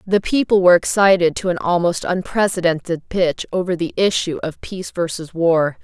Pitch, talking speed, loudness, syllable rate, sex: 175 Hz, 165 wpm, -18 LUFS, 5.2 syllables/s, female